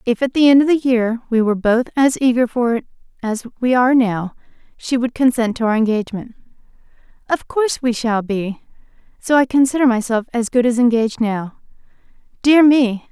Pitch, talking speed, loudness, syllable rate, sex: 240 Hz, 185 wpm, -17 LUFS, 5.6 syllables/s, female